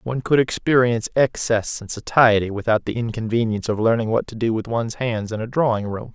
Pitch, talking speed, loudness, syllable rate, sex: 115 Hz, 205 wpm, -20 LUFS, 6.0 syllables/s, male